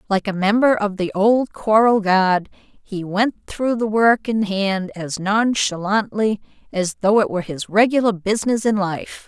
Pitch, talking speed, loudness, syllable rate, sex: 205 Hz, 170 wpm, -19 LUFS, 4.2 syllables/s, female